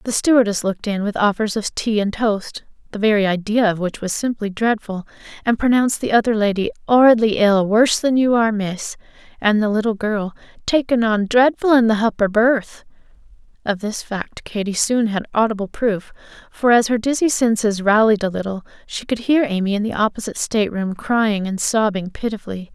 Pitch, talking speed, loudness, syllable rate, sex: 215 Hz, 180 wpm, -18 LUFS, 5.4 syllables/s, female